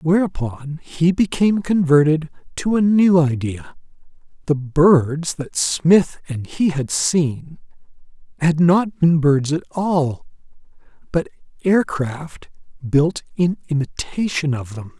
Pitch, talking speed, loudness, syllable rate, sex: 160 Hz, 115 wpm, -18 LUFS, 3.6 syllables/s, male